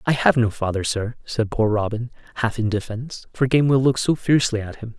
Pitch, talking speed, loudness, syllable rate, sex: 115 Hz, 215 wpm, -21 LUFS, 6.0 syllables/s, male